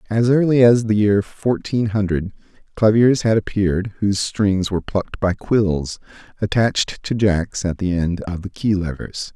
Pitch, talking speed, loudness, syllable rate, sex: 105 Hz, 165 wpm, -19 LUFS, 4.6 syllables/s, male